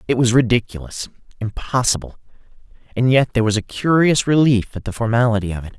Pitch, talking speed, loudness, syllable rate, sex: 120 Hz, 165 wpm, -18 LUFS, 6.2 syllables/s, male